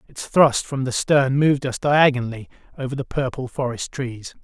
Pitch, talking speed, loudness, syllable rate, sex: 130 Hz, 175 wpm, -21 LUFS, 5.1 syllables/s, male